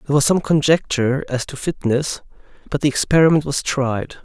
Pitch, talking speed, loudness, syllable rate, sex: 140 Hz, 170 wpm, -18 LUFS, 5.7 syllables/s, male